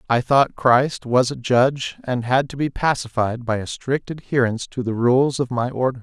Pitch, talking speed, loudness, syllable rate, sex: 125 Hz, 210 wpm, -20 LUFS, 4.9 syllables/s, male